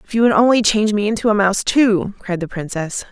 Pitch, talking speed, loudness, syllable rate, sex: 205 Hz, 250 wpm, -16 LUFS, 6.1 syllables/s, female